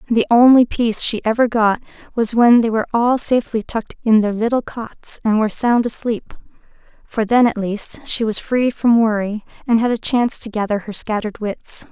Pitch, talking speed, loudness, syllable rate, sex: 225 Hz, 195 wpm, -17 LUFS, 5.2 syllables/s, female